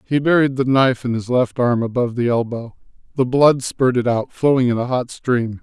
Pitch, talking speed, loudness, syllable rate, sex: 125 Hz, 215 wpm, -18 LUFS, 5.3 syllables/s, male